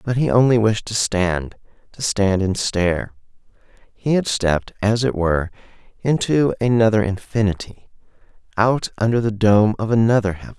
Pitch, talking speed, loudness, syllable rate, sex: 105 Hz, 145 wpm, -19 LUFS, 5.0 syllables/s, male